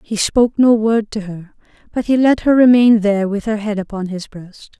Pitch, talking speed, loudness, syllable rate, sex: 215 Hz, 225 wpm, -15 LUFS, 5.2 syllables/s, female